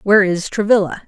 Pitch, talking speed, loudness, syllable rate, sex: 195 Hz, 170 wpm, -16 LUFS, 6.4 syllables/s, female